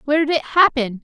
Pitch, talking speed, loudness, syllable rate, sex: 285 Hz, 230 wpm, -17 LUFS, 6.6 syllables/s, female